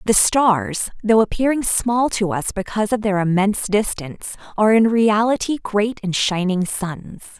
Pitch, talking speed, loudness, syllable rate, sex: 210 Hz, 155 wpm, -18 LUFS, 4.7 syllables/s, female